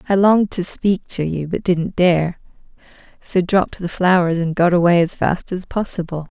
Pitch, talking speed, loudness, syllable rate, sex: 180 Hz, 190 wpm, -18 LUFS, 4.9 syllables/s, female